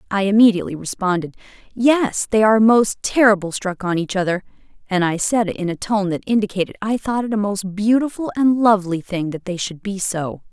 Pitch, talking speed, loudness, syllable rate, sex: 200 Hz, 200 wpm, -19 LUFS, 5.6 syllables/s, female